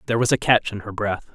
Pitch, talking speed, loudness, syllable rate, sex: 110 Hz, 315 wpm, -21 LUFS, 6.7 syllables/s, male